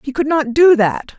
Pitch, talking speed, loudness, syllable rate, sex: 280 Hz, 255 wpm, -14 LUFS, 4.6 syllables/s, female